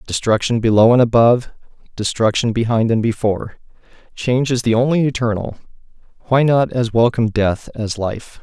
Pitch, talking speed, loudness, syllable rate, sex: 115 Hz, 135 wpm, -16 LUFS, 5.5 syllables/s, male